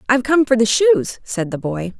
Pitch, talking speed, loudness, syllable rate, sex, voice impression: 245 Hz, 240 wpm, -17 LUFS, 5.1 syllables/s, female, feminine, slightly adult-like, clear, fluent, slightly intellectual, friendly, lively